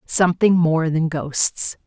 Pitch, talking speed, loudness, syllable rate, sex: 165 Hz, 130 wpm, -18 LUFS, 3.6 syllables/s, female